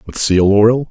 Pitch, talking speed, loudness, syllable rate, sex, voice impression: 110 Hz, 200 wpm, -12 LUFS, 3.9 syllables/s, male, masculine, middle-aged, thick, tensed, powerful, slightly hard, muffled, slightly raspy, cool, intellectual, sincere, mature, slightly friendly, wild, lively, slightly strict